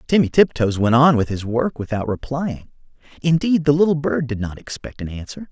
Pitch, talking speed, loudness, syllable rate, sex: 130 Hz, 195 wpm, -19 LUFS, 5.4 syllables/s, male